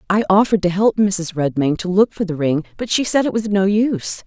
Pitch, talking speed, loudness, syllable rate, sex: 190 Hz, 255 wpm, -17 LUFS, 5.7 syllables/s, female